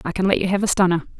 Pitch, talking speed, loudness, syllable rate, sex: 185 Hz, 350 wpm, -19 LUFS, 8.2 syllables/s, female